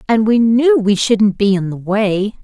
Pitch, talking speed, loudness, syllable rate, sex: 215 Hz, 220 wpm, -14 LUFS, 4.2 syllables/s, female